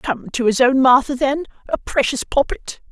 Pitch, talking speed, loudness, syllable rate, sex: 255 Hz, 185 wpm, -18 LUFS, 4.7 syllables/s, female